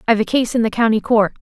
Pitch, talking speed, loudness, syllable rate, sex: 225 Hz, 290 wpm, -16 LUFS, 7.6 syllables/s, female